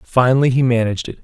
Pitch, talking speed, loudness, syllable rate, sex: 120 Hz, 195 wpm, -16 LUFS, 7.2 syllables/s, male